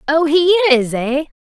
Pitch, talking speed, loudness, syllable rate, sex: 300 Hz, 170 wpm, -14 LUFS, 5.2 syllables/s, female